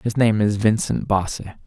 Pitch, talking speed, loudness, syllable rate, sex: 105 Hz, 180 wpm, -20 LUFS, 5.0 syllables/s, male